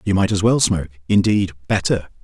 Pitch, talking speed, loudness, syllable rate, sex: 95 Hz, 190 wpm, -18 LUFS, 6.1 syllables/s, male